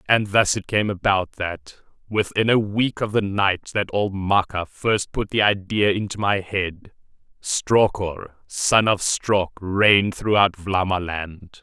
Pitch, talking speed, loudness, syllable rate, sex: 100 Hz, 150 wpm, -21 LUFS, 3.7 syllables/s, male